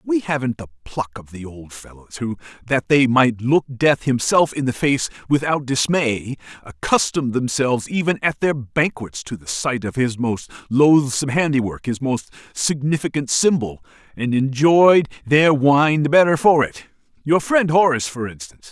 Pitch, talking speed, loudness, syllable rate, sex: 135 Hz, 155 wpm, -18 LUFS, 4.7 syllables/s, male